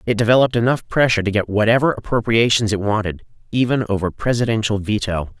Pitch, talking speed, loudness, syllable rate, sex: 110 Hz, 155 wpm, -18 LUFS, 6.5 syllables/s, male